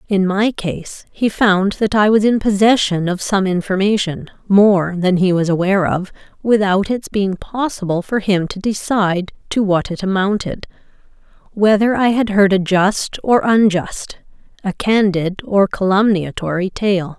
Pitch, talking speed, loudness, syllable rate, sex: 195 Hz, 155 wpm, -16 LUFS, 4.4 syllables/s, female